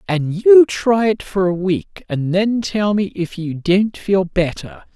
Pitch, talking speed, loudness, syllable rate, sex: 185 Hz, 195 wpm, -17 LUFS, 3.6 syllables/s, male